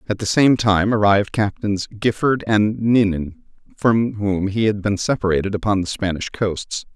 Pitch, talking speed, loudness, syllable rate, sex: 105 Hz, 165 wpm, -19 LUFS, 4.6 syllables/s, male